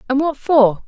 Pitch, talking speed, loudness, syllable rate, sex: 265 Hz, 205 wpm, -16 LUFS, 4.6 syllables/s, female